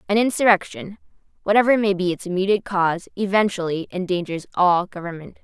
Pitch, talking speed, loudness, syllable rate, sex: 190 Hz, 135 wpm, -20 LUFS, 6.1 syllables/s, female